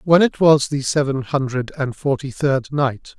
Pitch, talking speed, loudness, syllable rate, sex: 140 Hz, 190 wpm, -19 LUFS, 4.2 syllables/s, male